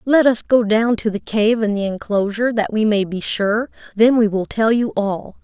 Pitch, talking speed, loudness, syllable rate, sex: 220 Hz, 230 wpm, -18 LUFS, 4.8 syllables/s, female